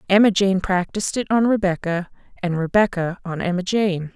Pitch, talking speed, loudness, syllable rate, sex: 190 Hz, 160 wpm, -20 LUFS, 5.3 syllables/s, female